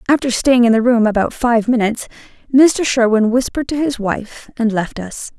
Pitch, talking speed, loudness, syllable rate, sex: 235 Hz, 190 wpm, -15 LUFS, 5.2 syllables/s, female